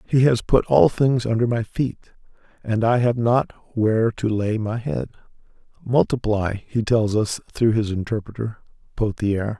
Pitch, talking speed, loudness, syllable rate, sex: 115 Hz, 150 wpm, -21 LUFS, 4.4 syllables/s, male